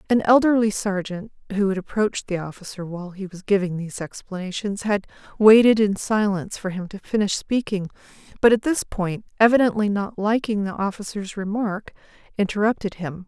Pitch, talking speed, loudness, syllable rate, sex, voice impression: 200 Hz, 160 wpm, -22 LUFS, 5.5 syllables/s, female, very feminine, adult-like, slightly intellectual, elegant, slightly sweet